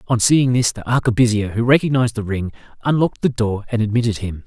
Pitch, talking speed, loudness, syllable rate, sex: 115 Hz, 200 wpm, -18 LUFS, 6.4 syllables/s, male